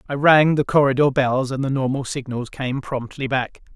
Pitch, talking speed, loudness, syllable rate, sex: 135 Hz, 190 wpm, -20 LUFS, 4.9 syllables/s, male